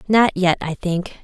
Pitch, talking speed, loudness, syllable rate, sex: 185 Hz, 195 wpm, -19 LUFS, 3.9 syllables/s, female